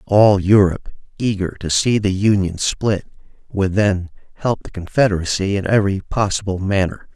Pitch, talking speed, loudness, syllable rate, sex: 100 Hz, 145 wpm, -18 LUFS, 5.0 syllables/s, male